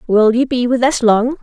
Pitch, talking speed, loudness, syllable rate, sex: 240 Hz, 255 wpm, -14 LUFS, 4.9 syllables/s, female